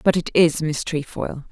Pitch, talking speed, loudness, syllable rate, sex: 155 Hz, 200 wpm, -21 LUFS, 4.6 syllables/s, female